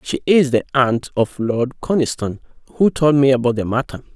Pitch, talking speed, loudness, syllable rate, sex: 130 Hz, 190 wpm, -17 LUFS, 5.2 syllables/s, male